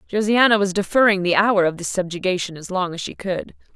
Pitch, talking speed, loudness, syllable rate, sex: 190 Hz, 210 wpm, -19 LUFS, 5.6 syllables/s, female